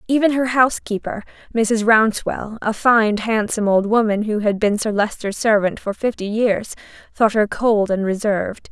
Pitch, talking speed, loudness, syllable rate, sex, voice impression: 215 Hz, 165 wpm, -18 LUFS, 5.0 syllables/s, female, feminine, slightly young, tensed, weak, soft, slightly raspy, slightly cute, calm, friendly, reassuring, kind, slightly modest